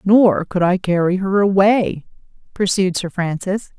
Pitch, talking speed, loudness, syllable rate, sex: 190 Hz, 145 wpm, -17 LUFS, 4.1 syllables/s, female